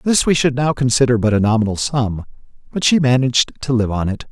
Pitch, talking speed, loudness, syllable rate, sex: 125 Hz, 225 wpm, -16 LUFS, 6.0 syllables/s, male